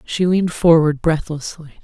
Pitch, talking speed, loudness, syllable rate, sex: 160 Hz, 130 wpm, -17 LUFS, 4.9 syllables/s, female